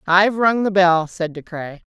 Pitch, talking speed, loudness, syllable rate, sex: 185 Hz, 220 wpm, -17 LUFS, 4.7 syllables/s, female